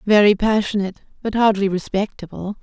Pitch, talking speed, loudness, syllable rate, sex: 205 Hz, 115 wpm, -19 LUFS, 5.9 syllables/s, female